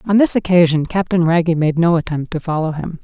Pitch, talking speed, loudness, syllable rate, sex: 170 Hz, 220 wpm, -16 LUFS, 5.8 syllables/s, female